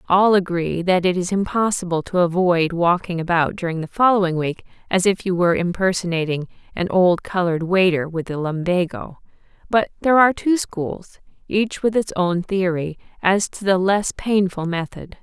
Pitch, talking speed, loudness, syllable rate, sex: 180 Hz, 165 wpm, -20 LUFS, 5.0 syllables/s, female